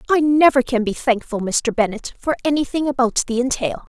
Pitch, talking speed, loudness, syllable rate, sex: 250 Hz, 180 wpm, -19 LUFS, 5.4 syllables/s, female